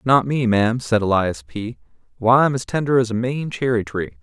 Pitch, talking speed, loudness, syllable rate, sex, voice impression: 115 Hz, 215 wpm, -19 LUFS, 5.4 syllables/s, male, masculine, adult-like, tensed, bright, fluent, slightly cool, intellectual, sincere, friendly, reassuring, slightly wild, kind, slightly modest